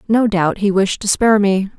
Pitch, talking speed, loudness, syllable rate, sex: 200 Hz, 235 wpm, -15 LUFS, 5.1 syllables/s, female